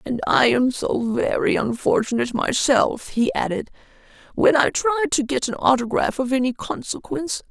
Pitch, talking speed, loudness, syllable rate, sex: 255 Hz, 150 wpm, -21 LUFS, 5.0 syllables/s, female